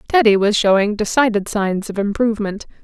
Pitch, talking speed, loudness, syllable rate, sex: 210 Hz, 150 wpm, -17 LUFS, 5.5 syllables/s, female